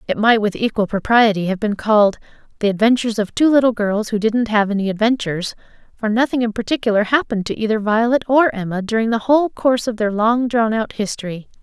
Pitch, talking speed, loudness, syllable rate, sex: 220 Hz, 200 wpm, -17 LUFS, 6.2 syllables/s, female